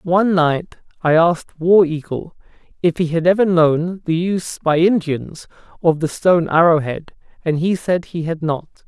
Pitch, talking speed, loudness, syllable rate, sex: 165 Hz, 175 wpm, -17 LUFS, 4.7 syllables/s, male